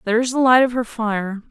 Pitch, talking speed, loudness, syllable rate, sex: 230 Hz, 240 wpm, -18 LUFS, 5.3 syllables/s, female